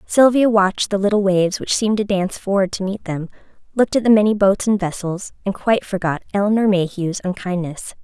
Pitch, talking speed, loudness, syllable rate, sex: 195 Hz, 195 wpm, -18 LUFS, 6.0 syllables/s, female